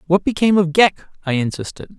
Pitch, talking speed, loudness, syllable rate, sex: 175 Hz, 180 wpm, -17 LUFS, 5.9 syllables/s, male